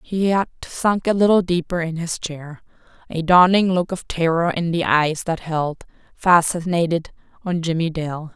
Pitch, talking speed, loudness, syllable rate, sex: 170 Hz, 160 wpm, -20 LUFS, 4.4 syllables/s, female